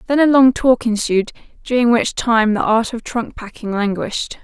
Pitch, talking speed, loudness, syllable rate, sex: 230 Hz, 190 wpm, -16 LUFS, 4.9 syllables/s, female